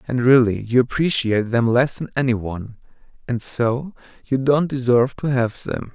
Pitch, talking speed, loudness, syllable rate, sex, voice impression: 125 Hz, 160 wpm, -20 LUFS, 4.9 syllables/s, male, very masculine, very adult-like, thick, slightly tensed, slightly weak, slightly bright, soft, slightly muffled, fluent, slightly raspy, slightly cool, intellectual, slightly refreshing, sincere, very calm, very mature, friendly, reassuring, unique, slightly elegant, slightly wild, slightly sweet, slightly lively, slightly strict, slightly intense